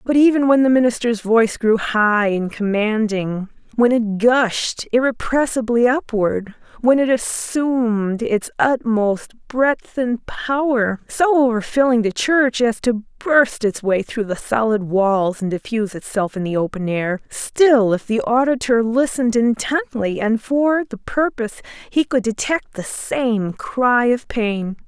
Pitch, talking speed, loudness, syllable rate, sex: 235 Hz, 140 wpm, -18 LUFS, 4.0 syllables/s, female